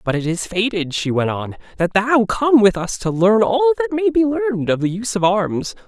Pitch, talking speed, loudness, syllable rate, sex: 190 Hz, 245 wpm, -18 LUFS, 5.2 syllables/s, male